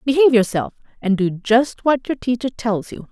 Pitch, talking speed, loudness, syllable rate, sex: 235 Hz, 190 wpm, -19 LUFS, 5.1 syllables/s, female